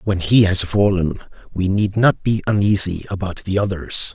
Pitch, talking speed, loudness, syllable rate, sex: 100 Hz, 175 wpm, -18 LUFS, 4.6 syllables/s, male